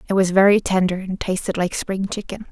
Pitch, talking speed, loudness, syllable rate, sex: 190 Hz, 215 wpm, -20 LUFS, 5.6 syllables/s, female